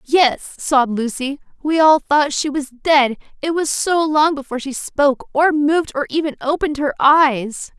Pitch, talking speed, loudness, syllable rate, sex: 285 Hz, 175 wpm, -17 LUFS, 4.6 syllables/s, female